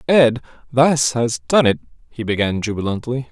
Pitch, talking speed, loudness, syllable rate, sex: 125 Hz, 145 wpm, -18 LUFS, 4.7 syllables/s, male